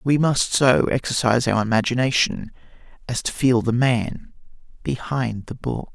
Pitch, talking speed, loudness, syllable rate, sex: 125 Hz, 140 wpm, -21 LUFS, 4.6 syllables/s, male